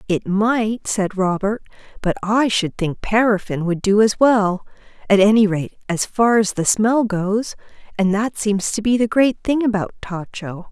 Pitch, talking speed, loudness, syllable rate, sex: 205 Hz, 175 wpm, -18 LUFS, 4.2 syllables/s, female